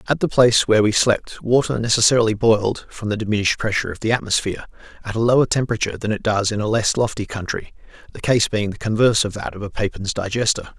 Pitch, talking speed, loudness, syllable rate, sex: 110 Hz, 215 wpm, -19 LUFS, 6.8 syllables/s, male